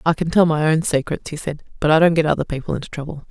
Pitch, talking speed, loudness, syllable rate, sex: 155 Hz, 290 wpm, -19 LUFS, 6.9 syllables/s, female